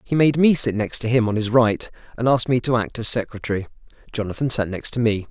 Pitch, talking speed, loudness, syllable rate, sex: 115 Hz, 250 wpm, -20 LUFS, 6.2 syllables/s, male